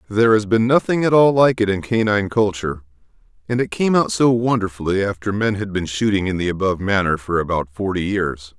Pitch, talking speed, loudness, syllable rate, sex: 100 Hz, 210 wpm, -18 LUFS, 6.0 syllables/s, male